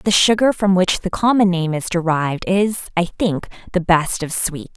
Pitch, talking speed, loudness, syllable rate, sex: 180 Hz, 200 wpm, -18 LUFS, 4.7 syllables/s, female